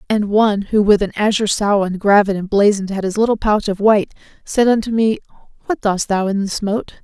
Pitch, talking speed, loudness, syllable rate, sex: 205 Hz, 215 wpm, -16 LUFS, 5.8 syllables/s, female